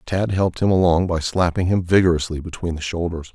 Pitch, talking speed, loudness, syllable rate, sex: 85 Hz, 195 wpm, -20 LUFS, 5.9 syllables/s, male